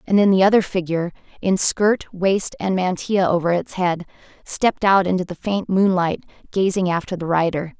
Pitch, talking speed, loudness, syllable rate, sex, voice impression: 185 Hz, 175 wpm, -19 LUFS, 5.3 syllables/s, female, feminine, adult-like, slightly relaxed, powerful, slightly dark, slightly muffled, raspy, slightly intellectual, calm, slightly strict, slightly sharp